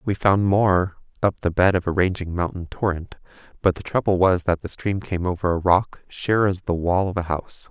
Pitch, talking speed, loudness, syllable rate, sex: 90 Hz, 225 wpm, -22 LUFS, 5.1 syllables/s, male